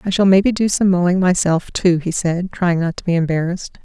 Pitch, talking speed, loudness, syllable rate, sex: 180 Hz, 235 wpm, -17 LUFS, 5.7 syllables/s, female